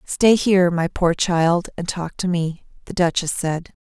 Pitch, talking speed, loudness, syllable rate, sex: 175 Hz, 190 wpm, -20 LUFS, 4.2 syllables/s, female